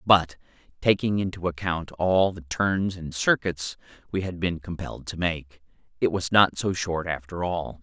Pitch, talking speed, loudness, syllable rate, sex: 90 Hz, 170 wpm, -25 LUFS, 4.5 syllables/s, male